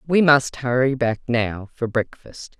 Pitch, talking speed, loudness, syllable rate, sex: 125 Hz, 160 wpm, -20 LUFS, 3.9 syllables/s, female